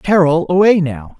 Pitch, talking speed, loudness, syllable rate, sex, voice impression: 185 Hz, 150 wpm, -13 LUFS, 4.5 syllables/s, female, slightly gender-neutral, adult-like, slightly hard, clear, fluent, intellectual, calm, slightly strict, sharp, modest